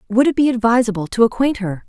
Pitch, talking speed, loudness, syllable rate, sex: 230 Hz, 225 wpm, -17 LUFS, 6.5 syllables/s, female